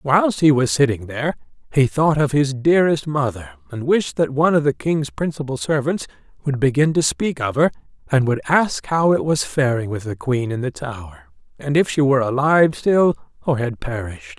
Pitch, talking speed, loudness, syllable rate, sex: 140 Hz, 200 wpm, -19 LUFS, 5.3 syllables/s, male